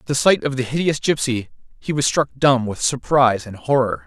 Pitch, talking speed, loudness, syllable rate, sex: 135 Hz, 220 wpm, -19 LUFS, 5.4 syllables/s, male